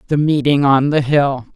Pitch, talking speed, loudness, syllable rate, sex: 140 Hz, 195 wpm, -15 LUFS, 4.5 syllables/s, female